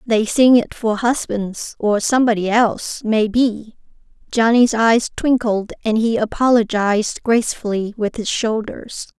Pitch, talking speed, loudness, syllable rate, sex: 225 Hz, 125 wpm, -17 LUFS, 4.3 syllables/s, female